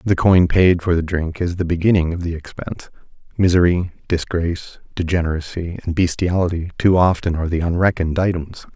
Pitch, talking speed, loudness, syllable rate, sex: 85 Hz, 160 wpm, -18 LUFS, 5.6 syllables/s, male